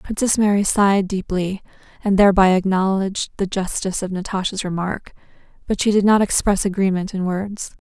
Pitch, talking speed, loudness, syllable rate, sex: 195 Hz, 155 wpm, -19 LUFS, 5.6 syllables/s, female